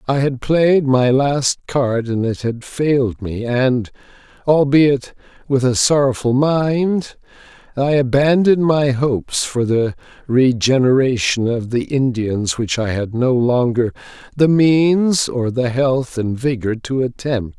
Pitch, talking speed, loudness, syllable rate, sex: 130 Hz, 140 wpm, -17 LUFS, 3.8 syllables/s, male